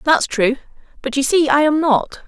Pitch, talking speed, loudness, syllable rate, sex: 285 Hz, 210 wpm, -16 LUFS, 4.7 syllables/s, female